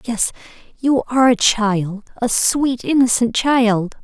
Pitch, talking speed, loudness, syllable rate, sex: 235 Hz, 120 wpm, -17 LUFS, 3.7 syllables/s, female